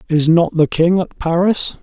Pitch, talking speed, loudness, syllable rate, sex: 170 Hz, 195 wpm, -15 LUFS, 4.3 syllables/s, male